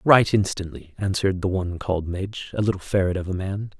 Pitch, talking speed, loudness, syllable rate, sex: 95 Hz, 205 wpm, -24 LUFS, 6.2 syllables/s, male